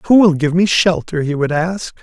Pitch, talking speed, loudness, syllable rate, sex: 170 Hz, 235 wpm, -15 LUFS, 4.6 syllables/s, male